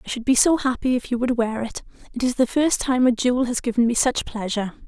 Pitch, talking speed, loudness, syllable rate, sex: 245 Hz, 260 wpm, -21 LUFS, 6.2 syllables/s, female